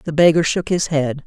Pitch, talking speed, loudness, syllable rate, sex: 155 Hz, 235 wpm, -17 LUFS, 5.2 syllables/s, female